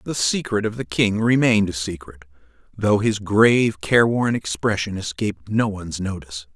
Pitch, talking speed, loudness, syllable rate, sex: 100 Hz, 155 wpm, -20 LUFS, 5.3 syllables/s, male